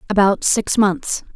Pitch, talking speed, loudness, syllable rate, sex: 210 Hz, 135 wpm, -17 LUFS, 3.7 syllables/s, female